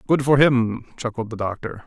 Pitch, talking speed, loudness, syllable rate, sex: 125 Hz, 195 wpm, -21 LUFS, 5.1 syllables/s, male